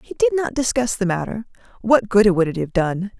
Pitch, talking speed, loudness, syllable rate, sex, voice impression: 210 Hz, 205 wpm, -19 LUFS, 5.2 syllables/s, female, feminine, adult-like, slightly fluent, slightly sincere, slightly friendly, elegant